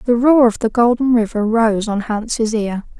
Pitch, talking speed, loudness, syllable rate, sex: 225 Hz, 200 wpm, -16 LUFS, 4.2 syllables/s, female